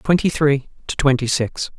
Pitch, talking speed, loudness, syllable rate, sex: 140 Hz, 170 wpm, -19 LUFS, 4.7 syllables/s, male